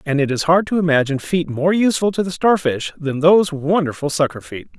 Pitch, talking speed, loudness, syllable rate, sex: 160 Hz, 215 wpm, -17 LUFS, 5.9 syllables/s, male